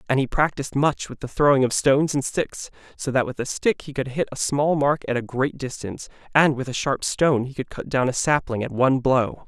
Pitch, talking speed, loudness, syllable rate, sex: 135 Hz, 255 wpm, -22 LUFS, 5.7 syllables/s, male